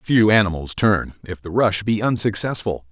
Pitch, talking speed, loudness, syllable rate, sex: 105 Hz, 165 wpm, -19 LUFS, 4.7 syllables/s, male